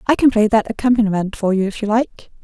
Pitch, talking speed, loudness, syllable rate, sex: 220 Hz, 245 wpm, -17 LUFS, 6.4 syllables/s, female